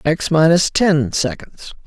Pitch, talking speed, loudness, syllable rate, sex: 155 Hz, 130 wpm, -15 LUFS, 3.6 syllables/s, female